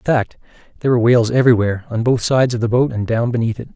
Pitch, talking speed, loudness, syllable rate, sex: 120 Hz, 255 wpm, -16 LUFS, 8.0 syllables/s, male